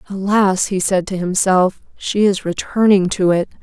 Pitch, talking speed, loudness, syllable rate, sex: 190 Hz, 165 wpm, -16 LUFS, 4.4 syllables/s, female